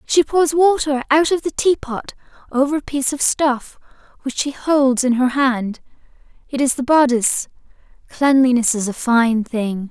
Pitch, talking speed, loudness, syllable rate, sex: 265 Hz, 165 wpm, -17 LUFS, 4.6 syllables/s, female